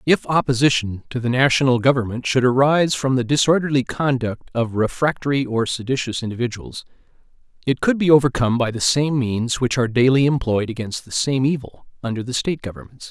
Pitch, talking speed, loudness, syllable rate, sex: 125 Hz, 170 wpm, -19 LUFS, 5.9 syllables/s, male